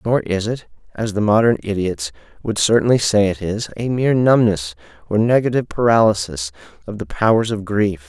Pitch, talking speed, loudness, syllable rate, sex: 105 Hz, 170 wpm, -18 LUFS, 4.2 syllables/s, male